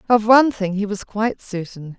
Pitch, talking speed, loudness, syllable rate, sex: 210 Hz, 210 wpm, -19 LUFS, 5.5 syllables/s, female